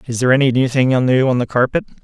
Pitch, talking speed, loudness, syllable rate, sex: 130 Hz, 235 wpm, -15 LUFS, 6.5 syllables/s, male